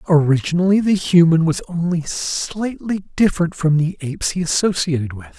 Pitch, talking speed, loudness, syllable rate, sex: 170 Hz, 145 wpm, -18 LUFS, 5.0 syllables/s, male